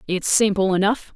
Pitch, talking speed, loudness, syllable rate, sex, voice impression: 195 Hz, 155 wpm, -19 LUFS, 5.1 syllables/s, female, very feminine, slightly young, adult-like, thin, very tensed, very powerful, bright, very hard, very clear, very fluent, cute, slightly intellectual, very refreshing, sincere, calm, friendly, reassuring, very unique, slightly elegant, very wild, slightly sweet, very lively, very strict, very intense, sharp